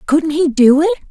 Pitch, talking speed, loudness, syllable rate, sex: 290 Hz, 215 wpm, -13 LUFS, 5.2 syllables/s, female